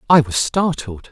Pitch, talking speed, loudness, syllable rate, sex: 140 Hz, 160 wpm, -18 LUFS, 4.3 syllables/s, male